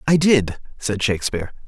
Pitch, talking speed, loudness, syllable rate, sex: 120 Hz, 145 wpm, -20 LUFS, 5.7 syllables/s, male